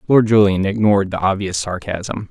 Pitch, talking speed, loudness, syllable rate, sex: 100 Hz, 155 wpm, -17 LUFS, 5.1 syllables/s, male